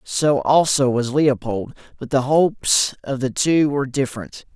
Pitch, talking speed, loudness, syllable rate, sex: 135 Hz, 160 wpm, -19 LUFS, 4.4 syllables/s, male